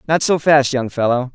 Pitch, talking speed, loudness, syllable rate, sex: 135 Hz, 225 wpm, -16 LUFS, 5.0 syllables/s, male